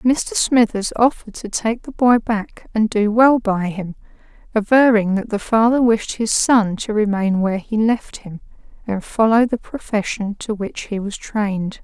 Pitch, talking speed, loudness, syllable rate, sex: 220 Hz, 175 wpm, -18 LUFS, 4.4 syllables/s, female